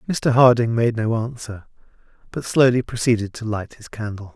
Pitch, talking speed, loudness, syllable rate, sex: 115 Hz, 165 wpm, -20 LUFS, 5.1 syllables/s, male